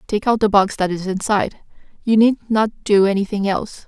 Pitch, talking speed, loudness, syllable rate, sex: 205 Hz, 200 wpm, -18 LUFS, 5.6 syllables/s, female